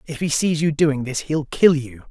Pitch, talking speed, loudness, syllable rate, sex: 145 Hz, 255 wpm, -20 LUFS, 4.6 syllables/s, male